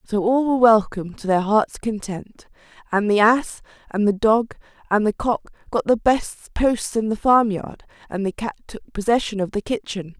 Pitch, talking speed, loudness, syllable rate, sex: 215 Hz, 190 wpm, -20 LUFS, 4.9 syllables/s, female